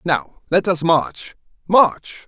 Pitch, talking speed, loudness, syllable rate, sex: 160 Hz, 130 wpm, -17 LUFS, 2.8 syllables/s, male